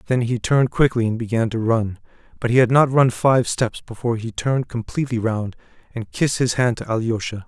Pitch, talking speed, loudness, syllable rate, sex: 120 Hz, 210 wpm, -20 LUFS, 5.8 syllables/s, male